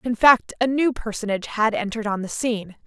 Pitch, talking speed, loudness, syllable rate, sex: 225 Hz, 210 wpm, -22 LUFS, 6.1 syllables/s, female